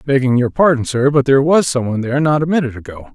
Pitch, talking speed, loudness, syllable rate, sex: 135 Hz, 250 wpm, -15 LUFS, 7.3 syllables/s, male